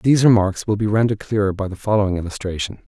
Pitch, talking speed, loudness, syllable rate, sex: 100 Hz, 205 wpm, -19 LUFS, 7.2 syllables/s, male